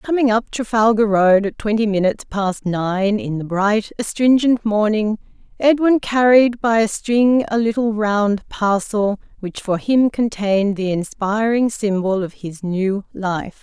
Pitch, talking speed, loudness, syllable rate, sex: 215 Hz, 150 wpm, -18 LUFS, 4.1 syllables/s, female